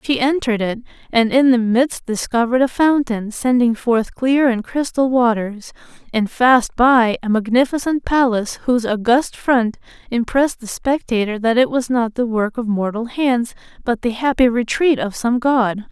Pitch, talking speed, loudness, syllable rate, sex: 240 Hz, 165 wpm, -17 LUFS, 4.7 syllables/s, female